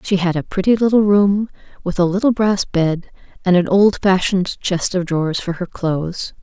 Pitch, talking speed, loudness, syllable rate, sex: 185 Hz, 185 wpm, -17 LUFS, 5.0 syllables/s, female